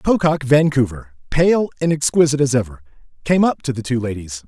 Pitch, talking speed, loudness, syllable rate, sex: 135 Hz, 175 wpm, -18 LUFS, 5.6 syllables/s, male